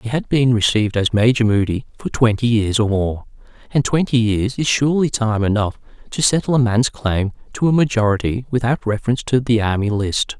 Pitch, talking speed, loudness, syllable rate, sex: 115 Hz, 190 wpm, -18 LUFS, 5.5 syllables/s, male